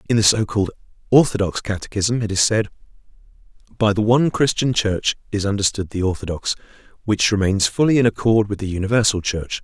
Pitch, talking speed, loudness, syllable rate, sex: 105 Hz, 160 wpm, -19 LUFS, 6.0 syllables/s, male